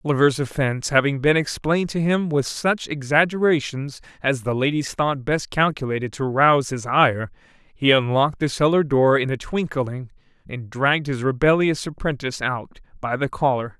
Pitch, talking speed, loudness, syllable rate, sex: 140 Hz, 160 wpm, -21 LUFS, 5.2 syllables/s, male